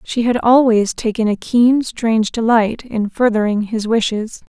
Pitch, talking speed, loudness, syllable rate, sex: 225 Hz, 160 wpm, -16 LUFS, 4.4 syllables/s, female